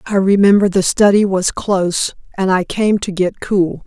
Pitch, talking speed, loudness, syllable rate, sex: 195 Hz, 185 wpm, -15 LUFS, 4.5 syllables/s, female